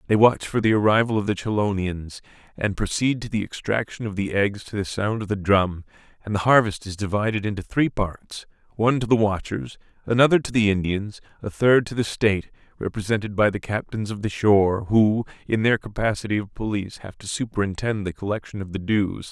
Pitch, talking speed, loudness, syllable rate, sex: 105 Hz, 195 wpm, -23 LUFS, 5.6 syllables/s, male